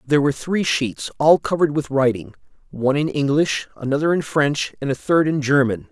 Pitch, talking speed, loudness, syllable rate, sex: 140 Hz, 185 wpm, -19 LUFS, 5.6 syllables/s, male